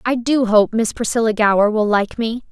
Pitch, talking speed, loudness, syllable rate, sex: 225 Hz, 215 wpm, -17 LUFS, 5.1 syllables/s, female